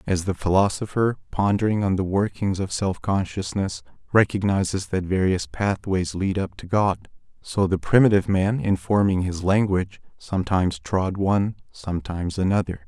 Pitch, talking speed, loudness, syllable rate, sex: 95 Hz, 145 wpm, -23 LUFS, 5.1 syllables/s, male